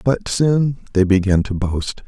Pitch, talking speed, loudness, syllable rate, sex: 105 Hz, 175 wpm, -18 LUFS, 3.9 syllables/s, male